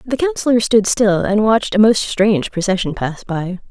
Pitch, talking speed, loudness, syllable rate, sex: 210 Hz, 195 wpm, -16 LUFS, 5.1 syllables/s, female